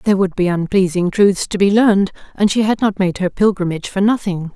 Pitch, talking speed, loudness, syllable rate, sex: 195 Hz, 225 wpm, -16 LUFS, 6.0 syllables/s, female